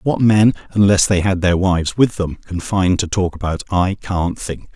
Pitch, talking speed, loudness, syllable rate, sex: 95 Hz, 215 wpm, -17 LUFS, 4.7 syllables/s, male